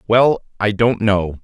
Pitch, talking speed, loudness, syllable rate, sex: 110 Hz, 170 wpm, -17 LUFS, 3.6 syllables/s, male